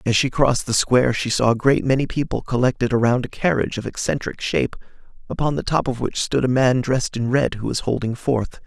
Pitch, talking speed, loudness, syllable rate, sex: 125 Hz, 230 wpm, -20 LUFS, 6.0 syllables/s, male